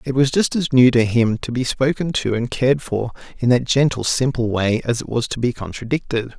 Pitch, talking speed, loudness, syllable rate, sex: 125 Hz, 235 wpm, -19 LUFS, 5.4 syllables/s, male